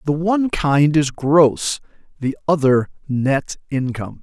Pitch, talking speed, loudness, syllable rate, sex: 145 Hz, 130 wpm, -18 LUFS, 4.0 syllables/s, male